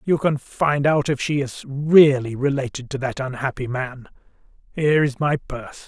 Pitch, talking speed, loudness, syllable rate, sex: 135 Hz, 175 wpm, -21 LUFS, 4.8 syllables/s, male